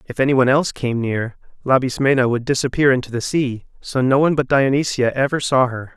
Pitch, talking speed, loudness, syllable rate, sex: 130 Hz, 200 wpm, -18 LUFS, 6.1 syllables/s, male